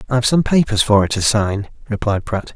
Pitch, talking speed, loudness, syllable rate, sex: 110 Hz, 210 wpm, -17 LUFS, 5.5 syllables/s, male